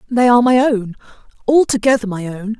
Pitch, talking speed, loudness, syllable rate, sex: 230 Hz, 140 wpm, -15 LUFS, 5.8 syllables/s, female